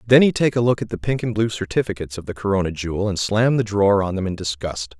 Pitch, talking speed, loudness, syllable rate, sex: 100 Hz, 275 wpm, -21 LUFS, 6.5 syllables/s, male